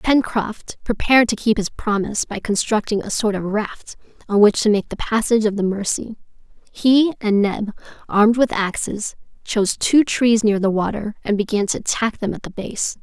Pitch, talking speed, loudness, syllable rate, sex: 215 Hz, 190 wpm, -19 LUFS, 5.0 syllables/s, female